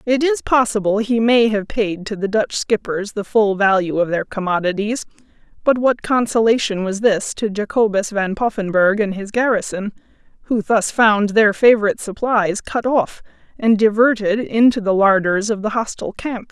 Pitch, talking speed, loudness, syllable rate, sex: 210 Hz, 165 wpm, -17 LUFS, 4.9 syllables/s, female